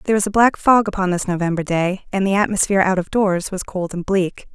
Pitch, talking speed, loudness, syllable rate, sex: 190 Hz, 250 wpm, -18 LUFS, 6.1 syllables/s, female